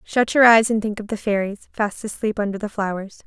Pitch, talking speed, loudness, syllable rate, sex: 210 Hz, 240 wpm, -20 LUFS, 5.7 syllables/s, female